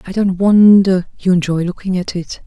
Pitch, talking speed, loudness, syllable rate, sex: 185 Hz, 195 wpm, -14 LUFS, 4.9 syllables/s, female